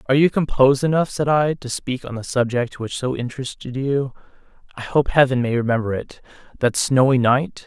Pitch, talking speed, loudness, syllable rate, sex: 130 Hz, 170 wpm, -20 LUFS, 5.5 syllables/s, male